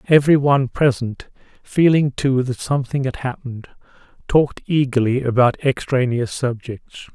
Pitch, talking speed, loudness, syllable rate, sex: 130 Hz, 110 wpm, -18 LUFS, 4.9 syllables/s, male